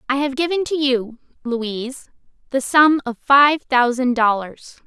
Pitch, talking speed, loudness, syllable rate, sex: 260 Hz, 150 wpm, -18 LUFS, 4.1 syllables/s, female